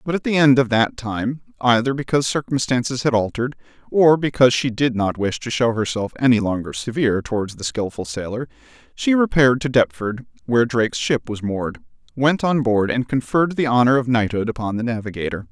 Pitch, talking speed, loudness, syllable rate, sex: 120 Hz, 190 wpm, -20 LUFS, 5.9 syllables/s, male